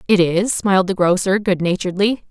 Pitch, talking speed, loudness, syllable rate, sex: 190 Hz, 180 wpm, -17 LUFS, 5.6 syllables/s, female